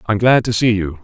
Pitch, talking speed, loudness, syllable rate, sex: 110 Hz, 350 wpm, -15 LUFS, 6.7 syllables/s, male